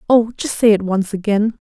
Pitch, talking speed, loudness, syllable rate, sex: 210 Hz, 215 wpm, -17 LUFS, 5.0 syllables/s, female